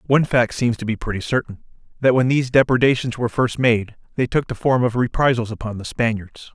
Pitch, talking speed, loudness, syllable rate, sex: 120 Hz, 210 wpm, -19 LUFS, 6.0 syllables/s, male